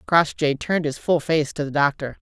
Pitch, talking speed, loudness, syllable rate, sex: 150 Hz, 210 wpm, -22 LUFS, 5.4 syllables/s, female